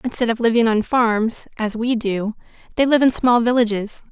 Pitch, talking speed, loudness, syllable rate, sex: 230 Hz, 190 wpm, -18 LUFS, 4.9 syllables/s, female